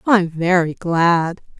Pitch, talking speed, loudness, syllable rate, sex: 175 Hz, 150 wpm, -17 LUFS, 3.9 syllables/s, female